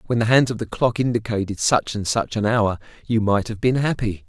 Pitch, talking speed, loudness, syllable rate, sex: 110 Hz, 240 wpm, -21 LUFS, 5.5 syllables/s, male